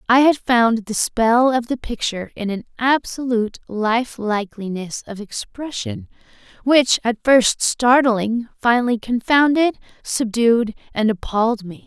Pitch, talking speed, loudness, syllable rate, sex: 235 Hz, 125 wpm, -19 LUFS, 4.2 syllables/s, female